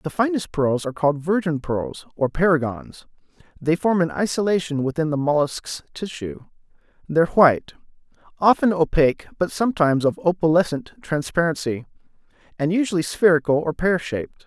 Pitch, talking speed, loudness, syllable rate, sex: 160 Hz, 135 wpm, -21 LUFS, 5.4 syllables/s, male